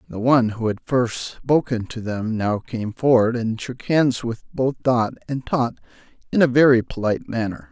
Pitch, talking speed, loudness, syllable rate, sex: 120 Hz, 185 wpm, -21 LUFS, 4.7 syllables/s, male